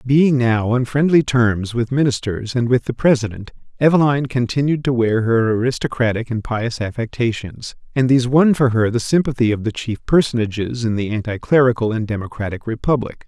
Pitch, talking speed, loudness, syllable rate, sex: 120 Hz, 170 wpm, -18 LUFS, 5.4 syllables/s, male